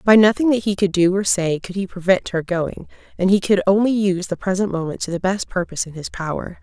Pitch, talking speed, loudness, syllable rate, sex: 190 Hz, 255 wpm, -19 LUFS, 6.0 syllables/s, female